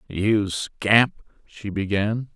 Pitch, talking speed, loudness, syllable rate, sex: 105 Hz, 100 wpm, -22 LUFS, 3.6 syllables/s, male